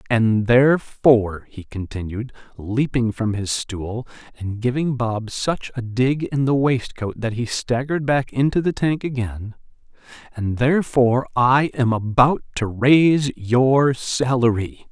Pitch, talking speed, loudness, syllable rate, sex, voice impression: 125 Hz, 135 wpm, -20 LUFS, 4.1 syllables/s, male, masculine, adult-like, slightly refreshing, slightly calm, friendly